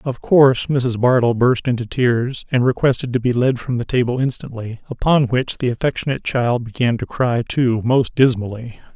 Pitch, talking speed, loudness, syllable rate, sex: 125 Hz, 180 wpm, -18 LUFS, 5.1 syllables/s, male